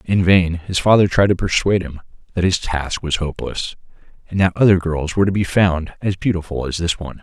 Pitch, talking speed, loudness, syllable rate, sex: 90 Hz, 215 wpm, -18 LUFS, 5.9 syllables/s, male